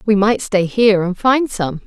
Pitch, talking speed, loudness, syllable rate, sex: 210 Hz, 225 wpm, -15 LUFS, 4.6 syllables/s, female